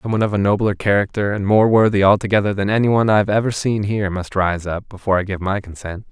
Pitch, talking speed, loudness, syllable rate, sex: 100 Hz, 235 wpm, -18 LUFS, 6.6 syllables/s, male